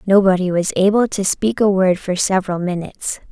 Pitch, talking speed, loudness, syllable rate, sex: 190 Hz, 180 wpm, -17 LUFS, 5.5 syllables/s, female